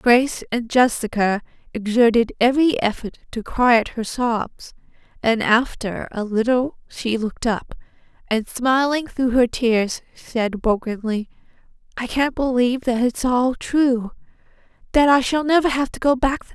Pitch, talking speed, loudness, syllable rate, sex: 245 Hz, 145 wpm, -20 LUFS, 4.5 syllables/s, female